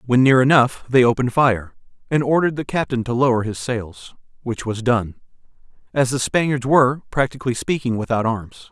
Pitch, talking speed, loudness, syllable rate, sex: 125 Hz, 170 wpm, -19 LUFS, 5.5 syllables/s, male